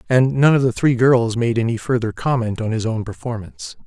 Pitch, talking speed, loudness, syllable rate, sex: 120 Hz, 215 wpm, -18 LUFS, 5.5 syllables/s, male